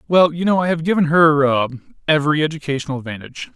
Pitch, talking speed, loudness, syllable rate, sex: 150 Hz, 150 wpm, -17 LUFS, 7.0 syllables/s, male